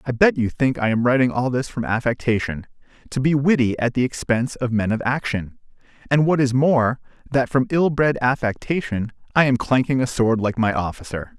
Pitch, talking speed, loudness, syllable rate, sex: 125 Hz, 200 wpm, -20 LUFS, 5.3 syllables/s, male